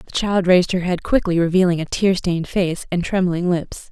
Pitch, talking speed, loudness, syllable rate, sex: 180 Hz, 215 wpm, -19 LUFS, 5.2 syllables/s, female